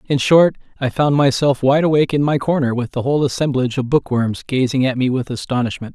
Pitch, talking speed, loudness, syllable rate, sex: 135 Hz, 210 wpm, -17 LUFS, 6.2 syllables/s, male